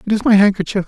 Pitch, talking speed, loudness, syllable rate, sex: 205 Hz, 275 wpm, -14 LUFS, 8.0 syllables/s, male